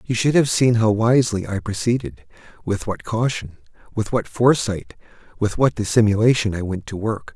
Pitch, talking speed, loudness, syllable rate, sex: 110 Hz, 145 wpm, -20 LUFS, 5.3 syllables/s, male